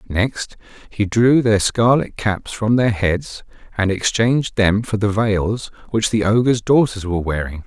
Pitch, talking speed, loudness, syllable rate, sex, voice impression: 110 Hz, 165 wpm, -18 LUFS, 4.2 syllables/s, male, very masculine, slightly old, very thick, very tensed, powerful, bright, soft, very clear, very fluent, slightly raspy, very cool, intellectual, refreshing, very sincere, calm, mature, very friendly, very reassuring, unique, elegant, very wild, sweet, lively, kind, slightly modest